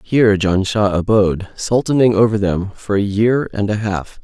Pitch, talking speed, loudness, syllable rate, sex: 105 Hz, 170 wpm, -16 LUFS, 4.7 syllables/s, male